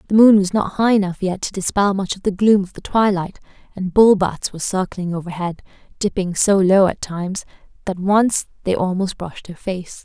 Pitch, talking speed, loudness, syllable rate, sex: 190 Hz, 195 wpm, -18 LUFS, 5.3 syllables/s, female